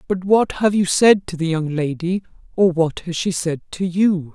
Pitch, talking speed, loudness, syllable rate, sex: 180 Hz, 205 wpm, -19 LUFS, 4.5 syllables/s, female